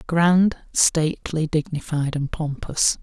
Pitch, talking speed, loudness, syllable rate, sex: 160 Hz, 100 wpm, -21 LUFS, 3.6 syllables/s, male